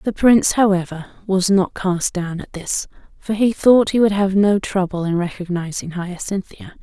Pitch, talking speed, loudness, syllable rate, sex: 190 Hz, 175 wpm, -18 LUFS, 4.7 syllables/s, female